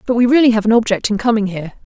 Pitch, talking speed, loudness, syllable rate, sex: 220 Hz, 280 wpm, -14 LUFS, 7.8 syllables/s, female